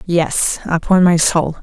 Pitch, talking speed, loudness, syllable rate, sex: 170 Hz, 145 wpm, -14 LUFS, 3.5 syllables/s, female